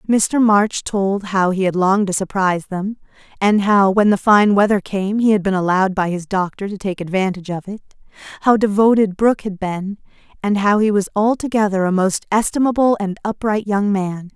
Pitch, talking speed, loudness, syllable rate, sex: 200 Hz, 190 wpm, -17 LUFS, 5.2 syllables/s, female